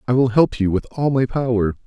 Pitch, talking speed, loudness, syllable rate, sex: 120 Hz, 260 wpm, -19 LUFS, 5.7 syllables/s, male